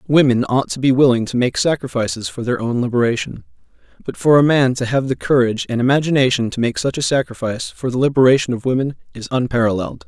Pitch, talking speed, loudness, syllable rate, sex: 130 Hz, 205 wpm, -17 LUFS, 6.5 syllables/s, male